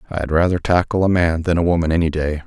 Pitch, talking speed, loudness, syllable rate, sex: 85 Hz, 245 wpm, -18 LUFS, 6.3 syllables/s, male